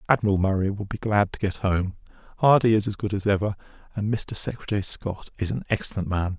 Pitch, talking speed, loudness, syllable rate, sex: 100 Hz, 205 wpm, -25 LUFS, 6.1 syllables/s, male